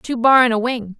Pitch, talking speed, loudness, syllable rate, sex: 235 Hz, 300 wpm, -15 LUFS, 5.3 syllables/s, female